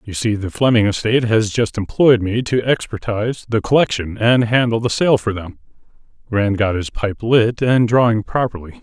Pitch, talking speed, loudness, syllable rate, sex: 110 Hz, 185 wpm, -17 LUFS, 5.0 syllables/s, male